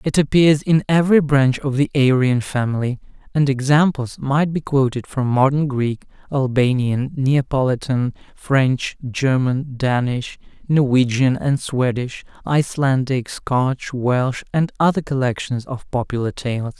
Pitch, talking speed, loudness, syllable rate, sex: 135 Hz, 120 wpm, -19 LUFS, 4.1 syllables/s, male